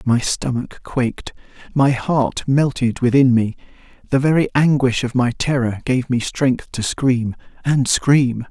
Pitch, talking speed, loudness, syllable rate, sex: 130 Hz, 135 wpm, -18 LUFS, 4.0 syllables/s, male